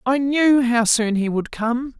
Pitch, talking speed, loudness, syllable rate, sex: 245 Hz, 210 wpm, -19 LUFS, 3.7 syllables/s, female